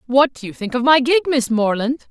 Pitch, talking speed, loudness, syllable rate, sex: 255 Hz, 255 wpm, -17 LUFS, 5.4 syllables/s, female